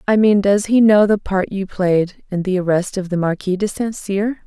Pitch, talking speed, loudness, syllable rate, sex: 195 Hz, 240 wpm, -17 LUFS, 4.7 syllables/s, female